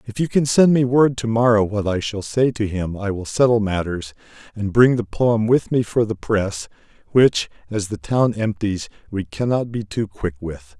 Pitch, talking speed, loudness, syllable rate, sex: 110 Hz, 210 wpm, -20 LUFS, 4.6 syllables/s, male